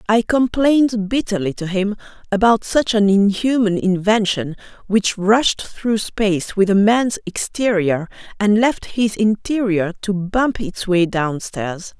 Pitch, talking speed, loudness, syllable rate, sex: 210 Hz, 135 wpm, -18 LUFS, 3.9 syllables/s, female